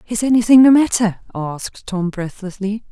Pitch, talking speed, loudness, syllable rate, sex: 210 Hz, 145 wpm, -16 LUFS, 5.1 syllables/s, female